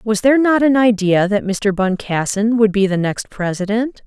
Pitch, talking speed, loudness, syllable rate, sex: 215 Hz, 190 wpm, -16 LUFS, 4.7 syllables/s, female